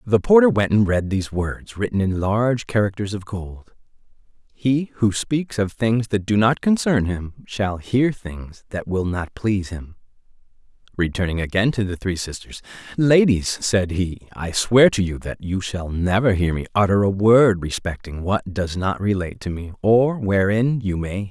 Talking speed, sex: 190 wpm, male